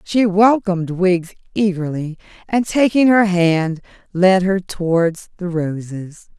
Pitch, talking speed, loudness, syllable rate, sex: 185 Hz, 120 wpm, -17 LUFS, 3.8 syllables/s, female